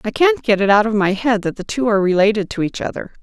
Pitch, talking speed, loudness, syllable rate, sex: 215 Hz, 295 wpm, -17 LUFS, 6.6 syllables/s, female